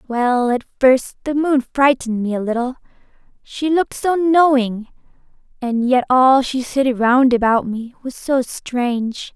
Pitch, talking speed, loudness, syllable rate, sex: 255 Hz, 145 wpm, -17 LUFS, 4.1 syllables/s, female